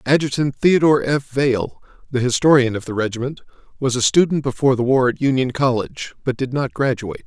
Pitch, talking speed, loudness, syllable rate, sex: 130 Hz, 180 wpm, -18 LUFS, 6.1 syllables/s, male